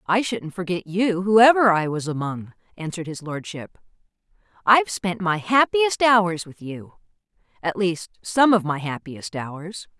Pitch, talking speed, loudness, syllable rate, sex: 185 Hz, 150 wpm, -21 LUFS, 4.3 syllables/s, female